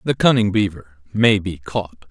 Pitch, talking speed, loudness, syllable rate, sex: 100 Hz, 170 wpm, -18 LUFS, 4.4 syllables/s, male